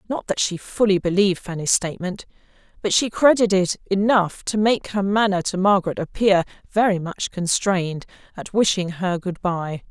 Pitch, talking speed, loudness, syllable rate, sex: 190 Hz, 155 wpm, -21 LUFS, 5.1 syllables/s, female